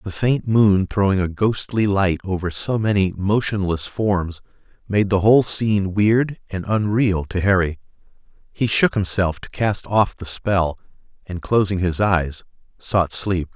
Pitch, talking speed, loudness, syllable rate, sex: 100 Hz, 155 wpm, -20 LUFS, 4.2 syllables/s, male